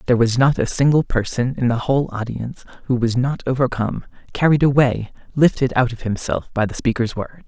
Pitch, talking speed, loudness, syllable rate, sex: 125 Hz, 195 wpm, -19 LUFS, 5.8 syllables/s, male